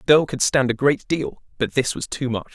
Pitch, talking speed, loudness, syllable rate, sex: 135 Hz, 285 wpm, -21 LUFS, 5.4 syllables/s, male